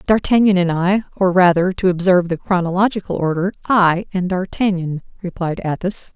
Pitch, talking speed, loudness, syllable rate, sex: 185 Hz, 145 wpm, -17 LUFS, 5.4 syllables/s, female